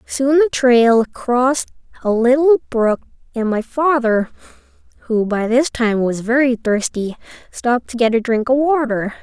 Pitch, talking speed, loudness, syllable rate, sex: 245 Hz, 155 wpm, -16 LUFS, 4.4 syllables/s, female